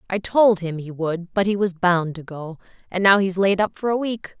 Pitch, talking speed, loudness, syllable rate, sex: 190 Hz, 260 wpm, -20 LUFS, 4.9 syllables/s, female